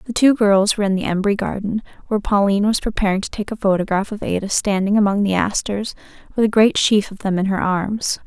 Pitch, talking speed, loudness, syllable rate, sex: 205 Hz, 225 wpm, -18 LUFS, 6.1 syllables/s, female